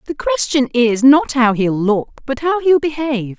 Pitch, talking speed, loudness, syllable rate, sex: 260 Hz, 195 wpm, -15 LUFS, 4.4 syllables/s, female